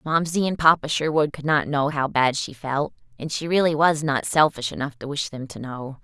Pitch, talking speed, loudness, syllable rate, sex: 145 Hz, 230 wpm, -22 LUFS, 5.1 syllables/s, female